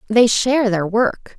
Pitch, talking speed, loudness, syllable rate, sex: 225 Hz, 175 wpm, -17 LUFS, 4.2 syllables/s, female